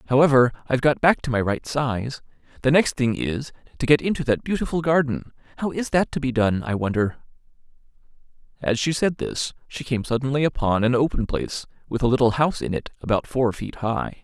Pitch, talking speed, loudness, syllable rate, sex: 130 Hz, 195 wpm, -22 LUFS, 5.7 syllables/s, male